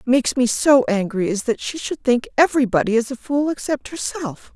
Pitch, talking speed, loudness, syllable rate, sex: 255 Hz, 210 wpm, -19 LUFS, 5.5 syllables/s, female